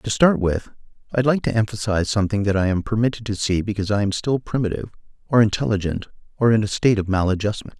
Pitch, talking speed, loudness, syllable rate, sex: 105 Hz, 210 wpm, -21 LUFS, 6.9 syllables/s, male